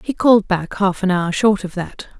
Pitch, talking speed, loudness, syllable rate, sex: 195 Hz, 245 wpm, -17 LUFS, 5.0 syllables/s, female